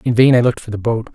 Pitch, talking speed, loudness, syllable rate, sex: 115 Hz, 365 wpm, -15 LUFS, 7.4 syllables/s, male